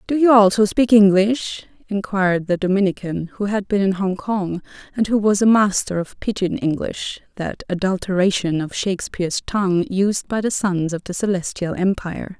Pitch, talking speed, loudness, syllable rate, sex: 195 Hz, 165 wpm, -19 LUFS, 5.0 syllables/s, female